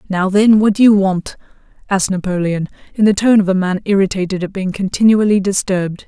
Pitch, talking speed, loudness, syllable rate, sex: 195 Hz, 190 wpm, -14 LUFS, 5.9 syllables/s, female